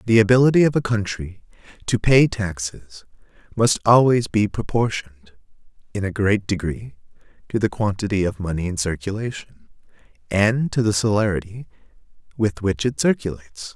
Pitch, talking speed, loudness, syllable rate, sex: 105 Hz, 135 wpm, -20 LUFS, 5.2 syllables/s, male